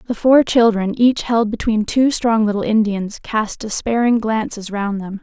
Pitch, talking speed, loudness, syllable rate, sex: 220 Hz, 170 wpm, -17 LUFS, 4.4 syllables/s, female